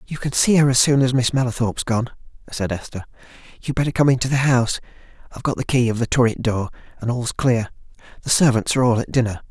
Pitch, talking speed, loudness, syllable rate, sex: 125 Hz, 210 wpm, -19 LUFS, 6.8 syllables/s, male